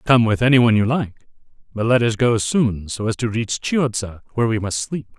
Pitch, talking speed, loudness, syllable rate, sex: 115 Hz, 220 wpm, -19 LUFS, 6.0 syllables/s, male